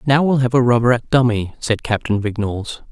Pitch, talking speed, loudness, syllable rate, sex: 120 Hz, 205 wpm, -17 LUFS, 5.6 syllables/s, male